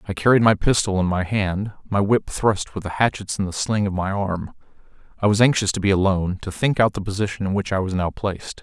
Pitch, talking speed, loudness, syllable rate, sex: 100 Hz, 250 wpm, -21 LUFS, 5.9 syllables/s, male